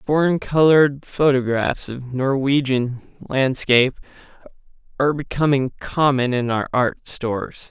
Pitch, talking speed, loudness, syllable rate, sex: 135 Hz, 100 wpm, -19 LUFS, 4.3 syllables/s, male